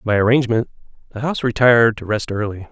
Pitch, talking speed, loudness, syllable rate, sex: 115 Hz, 175 wpm, -17 LUFS, 6.9 syllables/s, male